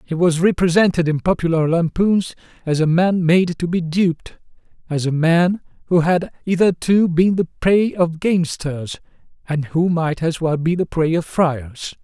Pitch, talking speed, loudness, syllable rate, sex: 170 Hz, 170 wpm, -18 LUFS, 4.5 syllables/s, male